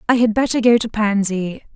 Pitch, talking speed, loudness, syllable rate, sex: 220 Hz, 205 wpm, -17 LUFS, 5.4 syllables/s, female